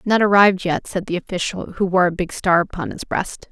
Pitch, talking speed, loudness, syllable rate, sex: 185 Hz, 240 wpm, -19 LUFS, 5.6 syllables/s, female